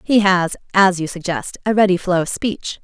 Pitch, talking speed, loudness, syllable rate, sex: 185 Hz, 210 wpm, -17 LUFS, 4.8 syllables/s, female